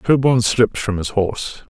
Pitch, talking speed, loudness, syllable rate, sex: 110 Hz, 170 wpm, -18 LUFS, 5.8 syllables/s, male